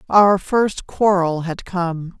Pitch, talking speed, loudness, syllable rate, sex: 185 Hz, 135 wpm, -18 LUFS, 3.0 syllables/s, female